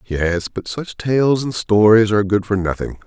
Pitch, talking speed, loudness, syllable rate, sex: 105 Hz, 195 wpm, -17 LUFS, 4.6 syllables/s, male